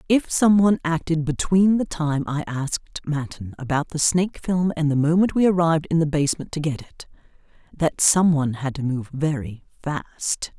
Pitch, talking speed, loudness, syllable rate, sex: 155 Hz, 185 wpm, -21 LUFS, 5.3 syllables/s, female